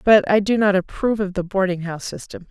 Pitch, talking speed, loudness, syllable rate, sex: 195 Hz, 240 wpm, -20 LUFS, 6.3 syllables/s, female